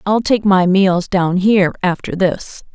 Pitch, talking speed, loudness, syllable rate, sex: 190 Hz, 175 wpm, -15 LUFS, 4.1 syllables/s, female